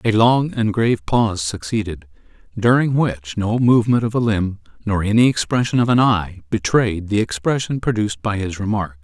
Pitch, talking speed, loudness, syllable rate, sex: 105 Hz, 175 wpm, -18 LUFS, 5.2 syllables/s, male